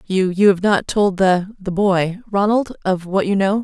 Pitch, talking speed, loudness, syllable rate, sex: 195 Hz, 150 wpm, -17 LUFS, 4.3 syllables/s, female